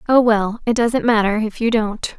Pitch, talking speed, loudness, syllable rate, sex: 225 Hz, 165 wpm, -17 LUFS, 4.6 syllables/s, female